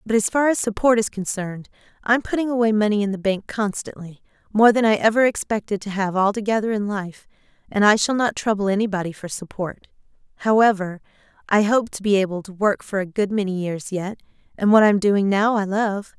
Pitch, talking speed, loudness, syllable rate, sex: 205 Hz, 205 wpm, -20 LUFS, 5.7 syllables/s, female